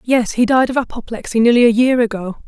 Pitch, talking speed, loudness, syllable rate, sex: 235 Hz, 220 wpm, -15 LUFS, 6.1 syllables/s, female